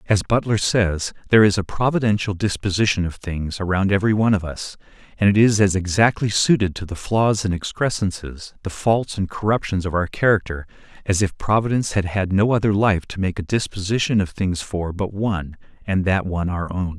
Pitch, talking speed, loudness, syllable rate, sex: 100 Hz, 195 wpm, -20 LUFS, 5.6 syllables/s, male